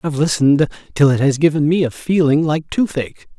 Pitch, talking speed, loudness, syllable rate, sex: 150 Hz, 195 wpm, -16 LUFS, 6.1 syllables/s, male